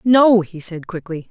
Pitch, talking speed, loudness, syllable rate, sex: 185 Hz, 185 wpm, -17 LUFS, 4.1 syllables/s, female